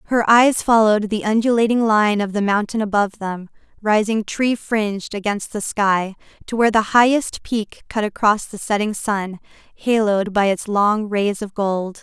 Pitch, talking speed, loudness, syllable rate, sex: 210 Hz, 170 wpm, -18 LUFS, 4.6 syllables/s, female